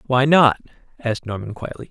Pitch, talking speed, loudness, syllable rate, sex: 125 Hz, 160 wpm, -19 LUFS, 6.0 syllables/s, male